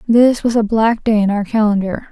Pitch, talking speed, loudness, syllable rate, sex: 220 Hz, 225 wpm, -15 LUFS, 5.2 syllables/s, female